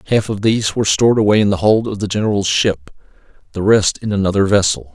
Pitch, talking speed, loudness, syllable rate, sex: 100 Hz, 220 wpm, -15 LUFS, 6.6 syllables/s, male